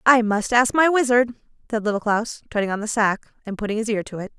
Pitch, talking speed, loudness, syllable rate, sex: 225 Hz, 245 wpm, -21 LUFS, 6.3 syllables/s, female